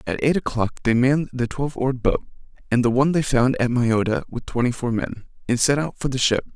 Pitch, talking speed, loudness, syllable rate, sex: 125 Hz, 240 wpm, -21 LUFS, 6.0 syllables/s, male